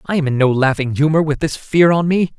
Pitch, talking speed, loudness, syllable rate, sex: 150 Hz, 275 wpm, -16 LUFS, 5.8 syllables/s, male